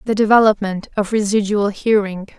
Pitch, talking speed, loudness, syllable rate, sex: 205 Hz, 125 wpm, -17 LUFS, 5.3 syllables/s, female